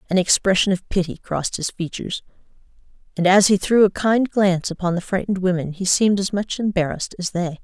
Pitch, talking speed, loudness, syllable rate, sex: 190 Hz, 195 wpm, -20 LUFS, 6.2 syllables/s, female